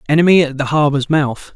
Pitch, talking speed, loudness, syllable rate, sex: 145 Hz, 195 wpm, -14 LUFS, 5.8 syllables/s, male